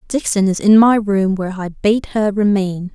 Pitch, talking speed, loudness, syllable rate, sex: 200 Hz, 205 wpm, -15 LUFS, 4.7 syllables/s, female